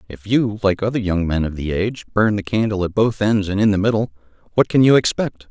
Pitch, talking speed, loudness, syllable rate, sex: 105 Hz, 250 wpm, -18 LUFS, 5.9 syllables/s, male